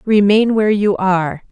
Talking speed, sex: 160 wpm, female